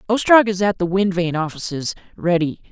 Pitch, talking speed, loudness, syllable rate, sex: 180 Hz, 175 wpm, -18 LUFS, 5.5 syllables/s, male